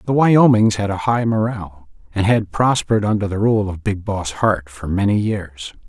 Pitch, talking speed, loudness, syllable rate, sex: 105 Hz, 195 wpm, -18 LUFS, 4.8 syllables/s, male